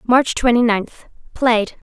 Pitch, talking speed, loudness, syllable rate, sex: 235 Hz, 95 wpm, -17 LUFS, 3.7 syllables/s, female